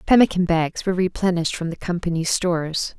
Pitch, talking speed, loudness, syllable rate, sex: 175 Hz, 160 wpm, -21 LUFS, 6.0 syllables/s, female